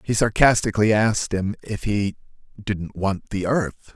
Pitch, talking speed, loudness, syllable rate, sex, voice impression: 100 Hz, 150 wpm, -22 LUFS, 4.7 syllables/s, male, very masculine, adult-like, thick, cool, wild